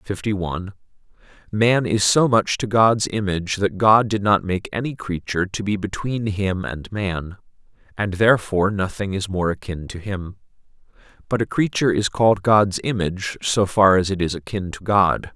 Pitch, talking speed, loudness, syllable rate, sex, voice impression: 100 Hz, 175 wpm, -20 LUFS, 4.9 syllables/s, male, very masculine, very adult-like, slightly middle-aged, very thick, tensed, powerful, slightly bright, slightly hard, slightly clear, fluent, very cool, very intellectual, slightly refreshing, sincere, very calm, mature, friendly, very reassuring, unique, slightly elegant, wild, slightly sweet, kind, slightly modest